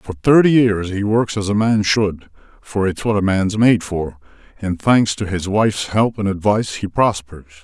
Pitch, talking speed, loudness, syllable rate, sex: 100 Hz, 195 wpm, -17 LUFS, 4.7 syllables/s, male